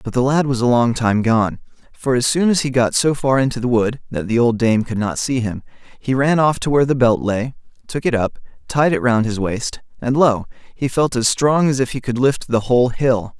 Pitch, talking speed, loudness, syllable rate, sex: 125 Hz, 255 wpm, -18 LUFS, 5.2 syllables/s, male